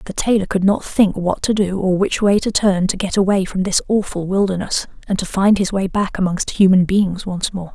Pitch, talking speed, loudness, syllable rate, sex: 190 Hz, 240 wpm, -17 LUFS, 5.2 syllables/s, female